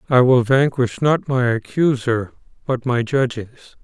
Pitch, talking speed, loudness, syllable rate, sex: 125 Hz, 140 wpm, -18 LUFS, 4.4 syllables/s, male